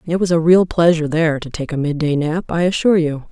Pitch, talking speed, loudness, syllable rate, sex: 160 Hz, 255 wpm, -16 LUFS, 6.3 syllables/s, female